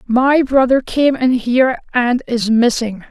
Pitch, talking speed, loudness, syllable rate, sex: 250 Hz, 155 wpm, -15 LUFS, 4.0 syllables/s, female